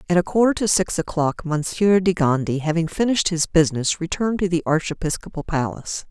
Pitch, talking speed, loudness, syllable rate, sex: 170 Hz, 175 wpm, -21 LUFS, 5.9 syllables/s, female